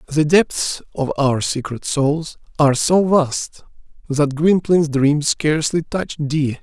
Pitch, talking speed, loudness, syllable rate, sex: 150 Hz, 135 wpm, -18 LUFS, 4.0 syllables/s, male